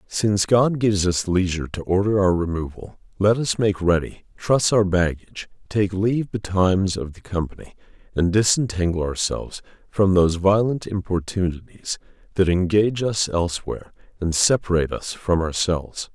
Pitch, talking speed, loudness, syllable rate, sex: 95 Hz, 140 wpm, -21 LUFS, 5.2 syllables/s, male